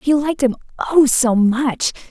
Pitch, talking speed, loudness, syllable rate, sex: 260 Hz, 140 wpm, -16 LUFS, 4.4 syllables/s, female